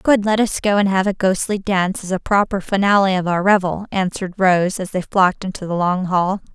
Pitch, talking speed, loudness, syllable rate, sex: 190 Hz, 230 wpm, -18 LUFS, 5.5 syllables/s, female